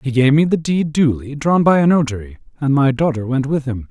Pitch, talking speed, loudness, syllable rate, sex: 140 Hz, 245 wpm, -16 LUFS, 5.5 syllables/s, male